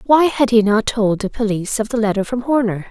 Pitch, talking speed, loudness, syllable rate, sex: 225 Hz, 250 wpm, -17 LUFS, 5.7 syllables/s, female